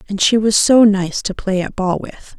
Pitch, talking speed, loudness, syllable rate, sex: 200 Hz, 250 wpm, -15 LUFS, 4.7 syllables/s, female